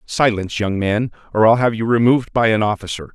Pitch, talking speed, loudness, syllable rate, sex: 110 Hz, 210 wpm, -17 LUFS, 6.1 syllables/s, male